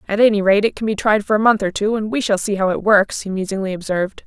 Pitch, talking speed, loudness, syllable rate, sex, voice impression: 205 Hz, 310 wpm, -17 LUFS, 6.6 syllables/s, female, very feminine, slightly young, slightly adult-like, very thin, tensed, slightly powerful, bright, hard, very clear, slightly halting, slightly cute, intellectual, slightly refreshing, very sincere, slightly calm, friendly, reassuring, slightly unique, elegant, sweet, slightly lively, very kind, slightly modest